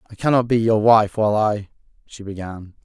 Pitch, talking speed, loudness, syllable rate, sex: 110 Hz, 190 wpm, -18 LUFS, 5.5 syllables/s, male